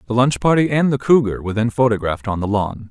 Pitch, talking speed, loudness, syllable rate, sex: 120 Hz, 250 wpm, -17 LUFS, 6.6 syllables/s, male